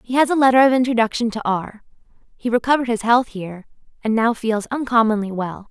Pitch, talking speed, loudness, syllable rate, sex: 230 Hz, 190 wpm, -18 LUFS, 6.2 syllables/s, female